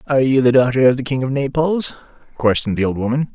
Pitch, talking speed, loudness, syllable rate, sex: 130 Hz, 235 wpm, -17 LUFS, 6.8 syllables/s, male